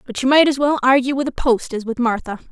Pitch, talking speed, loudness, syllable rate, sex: 255 Hz, 285 wpm, -17 LUFS, 6.2 syllables/s, female